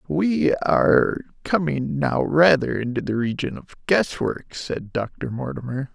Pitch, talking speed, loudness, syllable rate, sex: 135 Hz, 130 wpm, -22 LUFS, 3.9 syllables/s, male